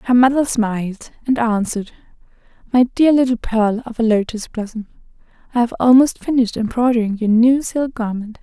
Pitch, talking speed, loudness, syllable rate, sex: 235 Hz, 155 wpm, -17 LUFS, 5.4 syllables/s, female